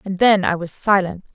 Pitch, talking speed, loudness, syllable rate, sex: 190 Hz, 225 wpm, -17 LUFS, 5.1 syllables/s, female